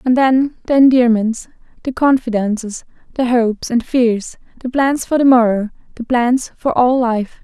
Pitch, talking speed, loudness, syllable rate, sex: 245 Hz, 160 wpm, -15 LUFS, 4.5 syllables/s, female